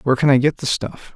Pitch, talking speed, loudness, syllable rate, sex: 135 Hz, 310 wpm, -18 LUFS, 6.7 syllables/s, male